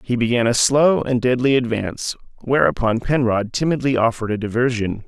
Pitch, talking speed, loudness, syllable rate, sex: 120 Hz, 155 wpm, -19 LUFS, 5.5 syllables/s, male